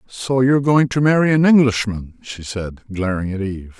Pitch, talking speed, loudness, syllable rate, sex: 115 Hz, 190 wpm, -17 LUFS, 5.1 syllables/s, male